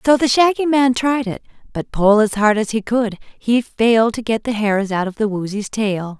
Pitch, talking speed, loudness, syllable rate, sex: 225 Hz, 230 wpm, -17 LUFS, 4.8 syllables/s, female